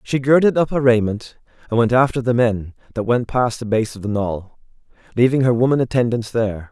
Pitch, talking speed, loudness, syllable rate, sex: 120 Hz, 205 wpm, -18 LUFS, 5.6 syllables/s, male